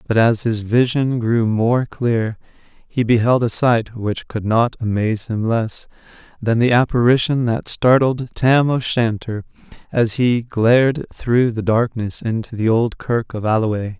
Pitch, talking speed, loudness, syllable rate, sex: 115 Hz, 160 wpm, -18 LUFS, 4.1 syllables/s, male